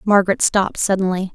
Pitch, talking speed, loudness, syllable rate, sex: 195 Hz, 135 wpm, -17 LUFS, 6.6 syllables/s, female